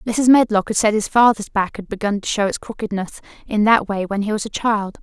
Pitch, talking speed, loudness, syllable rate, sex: 210 Hz, 250 wpm, -18 LUFS, 5.7 syllables/s, female